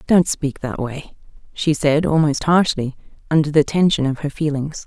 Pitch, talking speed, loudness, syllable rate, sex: 150 Hz, 175 wpm, -19 LUFS, 4.7 syllables/s, female